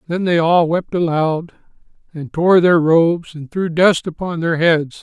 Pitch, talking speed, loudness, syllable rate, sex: 165 Hz, 180 wpm, -16 LUFS, 4.3 syllables/s, male